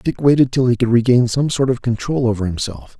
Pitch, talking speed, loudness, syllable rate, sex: 125 Hz, 240 wpm, -17 LUFS, 5.8 syllables/s, male